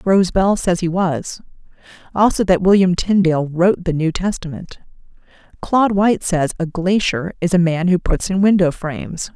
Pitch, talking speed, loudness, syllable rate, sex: 180 Hz, 165 wpm, -17 LUFS, 5.0 syllables/s, female